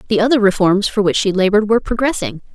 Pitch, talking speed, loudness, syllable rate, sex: 205 Hz, 210 wpm, -15 LUFS, 7.1 syllables/s, female